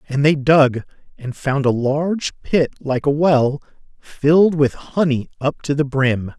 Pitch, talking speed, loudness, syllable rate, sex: 140 Hz, 170 wpm, -18 LUFS, 4.1 syllables/s, male